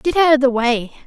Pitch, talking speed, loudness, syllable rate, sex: 270 Hz, 280 wpm, -16 LUFS, 5.7 syllables/s, female